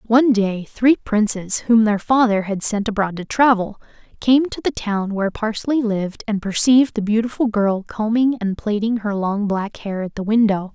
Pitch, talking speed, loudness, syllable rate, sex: 215 Hz, 190 wpm, -19 LUFS, 4.8 syllables/s, female